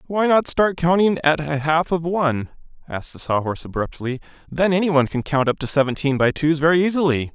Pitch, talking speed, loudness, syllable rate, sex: 155 Hz, 205 wpm, -20 LUFS, 5.8 syllables/s, male